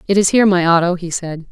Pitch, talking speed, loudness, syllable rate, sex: 180 Hz, 280 wpm, -15 LUFS, 6.8 syllables/s, female